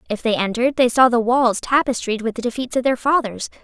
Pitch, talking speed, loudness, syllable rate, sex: 240 Hz, 230 wpm, -18 LUFS, 6.0 syllables/s, female